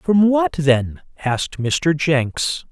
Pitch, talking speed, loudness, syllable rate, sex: 155 Hz, 135 wpm, -18 LUFS, 2.9 syllables/s, male